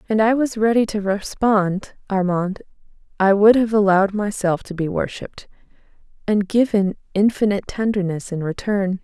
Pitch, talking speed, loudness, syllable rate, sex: 200 Hz, 140 wpm, -19 LUFS, 5.0 syllables/s, female